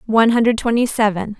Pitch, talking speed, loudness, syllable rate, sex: 225 Hz, 170 wpm, -16 LUFS, 6.4 syllables/s, female